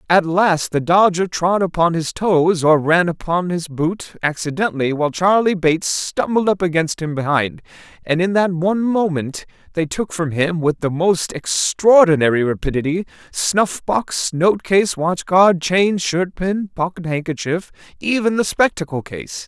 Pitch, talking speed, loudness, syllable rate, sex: 175 Hz, 155 wpm, -18 LUFS, 4.3 syllables/s, male